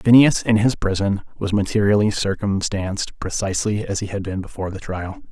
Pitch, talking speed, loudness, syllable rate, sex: 100 Hz, 170 wpm, -21 LUFS, 5.6 syllables/s, male